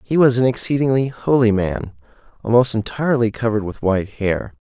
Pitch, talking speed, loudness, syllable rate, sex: 115 Hz, 155 wpm, -18 LUFS, 5.8 syllables/s, male